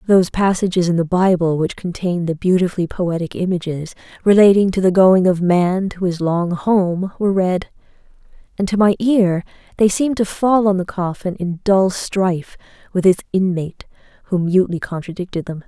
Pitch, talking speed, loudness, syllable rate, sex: 185 Hz, 170 wpm, -17 LUFS, 5.2 syllables/s, female